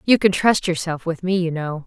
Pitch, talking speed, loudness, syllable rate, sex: 175 Hz, 260 wpm, -20 LUFS, 5.2 syllables/s, female